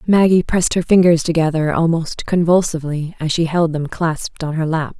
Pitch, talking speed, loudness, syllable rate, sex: 165 Hz, 180 wpm, -17 LUFS, 5.4 syllables/s, female